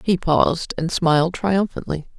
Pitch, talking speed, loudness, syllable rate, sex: 170 Hz, 135 wpm, -20 LUFS, 4.5 syllables/s, female